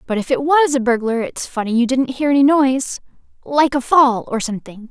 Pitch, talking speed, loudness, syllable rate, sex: 260 Hz, 210 wpm, -17 LUFS, 5.5 syllables/s, female